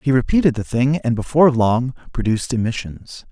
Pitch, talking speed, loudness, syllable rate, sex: 125 Hz, 165 wpm, -18 LUFS, 5.6 syllables/s, male